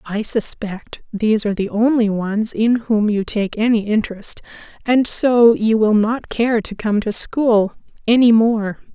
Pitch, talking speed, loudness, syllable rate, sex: 220 Hz, 170 wpm, -17 LUFS, 4.2 syllables/s, female